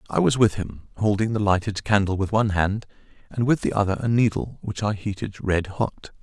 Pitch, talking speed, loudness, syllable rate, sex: 105 Hz, 210 wpm, -23 LUFS, 5.5 syllables/s, male